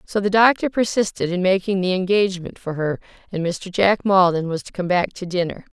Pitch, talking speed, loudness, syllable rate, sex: 185 Hz, 210 wpm, -20 LUFS, 5.5 syllables/s, female